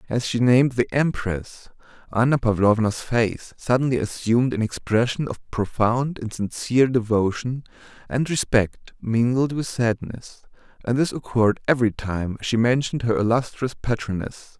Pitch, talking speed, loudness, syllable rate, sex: 120 Hz, 130 wpm, -22 LUFS, 4.7 syllables/s, male